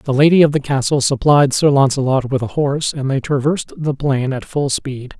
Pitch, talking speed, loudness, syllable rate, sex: 135 Hz, 220 wpm, -16 LUFS, 5.3 syllables/s, male